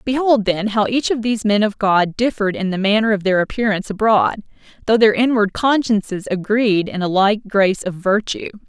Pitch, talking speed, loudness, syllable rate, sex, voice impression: 210 Hz, 195 wpm, -17 LUFS, 5.5 syllables/s, female, feminine, adult-like, slightly powerful, clear, slightly intellectual, slightly sharp